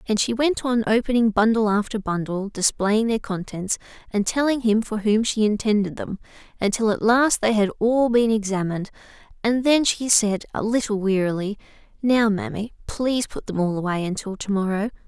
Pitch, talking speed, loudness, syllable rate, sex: 215 Hz, 175 wpm, -22 LUFS, 5.2 syllables/s, female